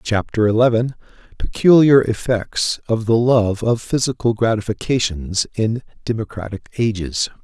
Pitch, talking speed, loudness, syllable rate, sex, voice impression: 110 Hz, 105 wpm, -18 LUFS, 4.6 syllables/s, male, very masculine, very middle-aged, very thick, slightly tensed, very powerful, bright, soft, muffled, fluent, slightly raspy, very cool, intellectual, refreshing, slightly sincere, calm, mature, very friendly, very reassuring, very unique, slightly elegant, wild, sweet, lively, kind, slightly modest